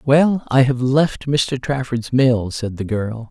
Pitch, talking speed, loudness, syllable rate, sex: 130 Hz, 180 wpm, -18 LUFS, 3.5 syllables/s, male